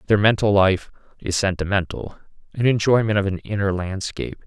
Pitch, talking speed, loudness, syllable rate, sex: 100 Hz, 150 wpm, -21 LUFS, 5.6 syllables/s, male